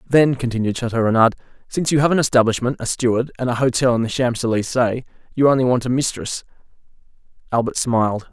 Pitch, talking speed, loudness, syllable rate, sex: 125 Hz, 180 wpm, -19 LUFS, 6.5 syllables/s, male